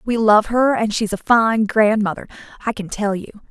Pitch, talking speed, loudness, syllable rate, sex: 215 Hz, 205 wpm, -18 LUFS, 4.8 syllables/s, female